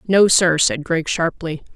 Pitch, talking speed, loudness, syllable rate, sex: 170 Hz, 170 wpm, -17 LUFS, 4.1 syllables/s, female